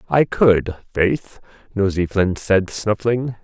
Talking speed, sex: 120 wpm, male